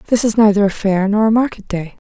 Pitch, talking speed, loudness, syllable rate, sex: 210 Hz, 260 wpm, -15 LUFS, 6.2 syllables/s, female